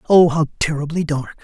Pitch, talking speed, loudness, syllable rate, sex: 155 Hz, 165 wpm, -18 LUFS, 5.6 syllables/s, male